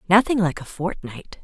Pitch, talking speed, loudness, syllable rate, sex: 190 Hz, 165 wpm, -22 LUFS, 4.8 syllables/s, female